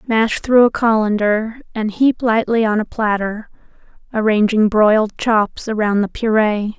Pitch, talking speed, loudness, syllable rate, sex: 220 Hz, 140 wpm, -16 LUFS, 4.3 syllables/s, female